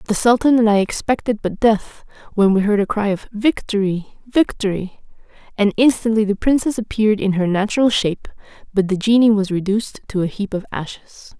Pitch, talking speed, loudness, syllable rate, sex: 210 Hz, 180 wpm, -18 LUFS, 5.4 syllables/s, female